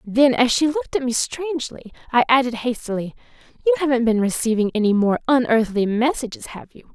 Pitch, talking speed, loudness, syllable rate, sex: 250 Hz, 175 wpm, -20 LUFS, 5.8 syllables/s, female